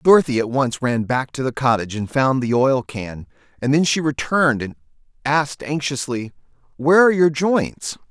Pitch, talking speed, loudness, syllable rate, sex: 135 Hz, 180 wpm, -19 LUFS, 5.3 syllables/s, male